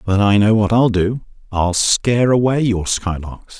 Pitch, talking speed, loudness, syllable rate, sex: 105 Hz, 185 wpm, -16 LUFS, 4.4 syllables/s, male